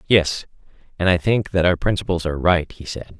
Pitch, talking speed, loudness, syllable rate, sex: 85 Hz, 205 wpm, -20 LUFS, 5.7 syllables/s, male